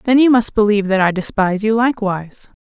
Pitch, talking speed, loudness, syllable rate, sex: 210 Hz, 205 wpm, -15 LUFS, 6.6 syllables/s, female